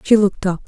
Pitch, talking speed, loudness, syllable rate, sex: 195 Hz, 270 wpm, -17 LUFS, 7.1 syllables/s, female